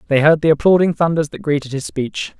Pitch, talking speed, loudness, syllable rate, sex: 155 Hz, 225 wpm, -16 LUFS, 6.0 syllables/s, male